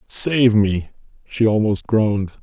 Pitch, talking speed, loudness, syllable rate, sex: 110 Hz, 125 wpm, -18 LUFS, 3.7 syllables/s, male